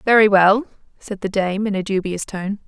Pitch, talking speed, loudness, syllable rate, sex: 200 Hz, 200 wpm, -18 LUFS, 5.1 syllables/s, female